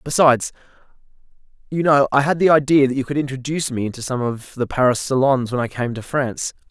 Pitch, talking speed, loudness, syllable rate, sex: 135 Hz, 205 wpm, -19 LUFS, 6.3 syllables/s, male